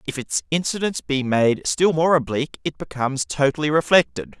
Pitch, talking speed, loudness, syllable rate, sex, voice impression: 145 Hz, 165 wpm, -21 LUFS, 5.5 syllables/s, male, masculine, adult-like, bright, clear, slightly halting, friendly, unique, slightly wild, lively, slightly kind, slightly modest